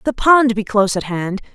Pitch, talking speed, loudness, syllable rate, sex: 220 Hz, 235 wpm, -16 LUFS, 5.3 syllables/s, female